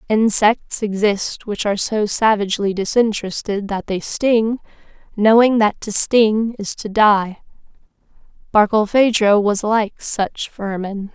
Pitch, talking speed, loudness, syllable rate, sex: 210 Hz, 120 wpm, -17 LUFS, 4.0 syllables/s, female